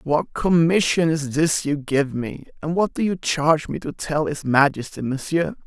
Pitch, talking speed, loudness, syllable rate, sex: 150 Hz, 190 wpm, -21 LUFS, 4.5 syllables/s, male